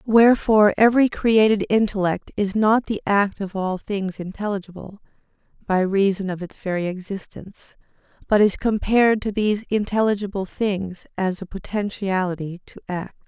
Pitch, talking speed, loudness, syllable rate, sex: 200 Hz, 135 wpm, -21 LUFS, 5.1 syllables/s, female